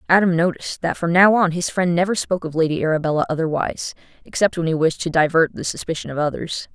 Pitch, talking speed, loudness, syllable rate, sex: 170 Hz, 215 wpm, -19 LUFS, 6.7 syllables/s, female